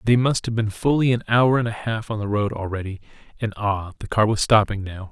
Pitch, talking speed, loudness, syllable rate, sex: 110 Hz, 235 wpm, -22 LUFS, 5.7 syllables/s, male